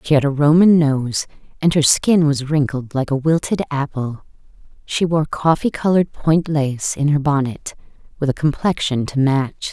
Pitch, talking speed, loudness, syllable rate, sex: 145 Hz, 175 wpm, -18 LUFS, 4.7 syllables/s, female